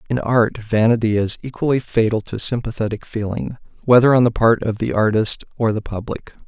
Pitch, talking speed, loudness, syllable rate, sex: 115 Hz, 175 wpm, -18 LUFS, 5.4 syllables/s, male